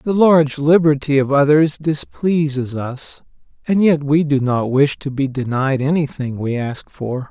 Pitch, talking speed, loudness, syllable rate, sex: 145 Hz, 165 wpm, -17 LUFS, 4.3 syllables/s, male